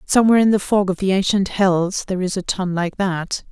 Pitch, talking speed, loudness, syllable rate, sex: 190 Hz, 240 wpm, -18 LUFS, 5.7 syllables/s, female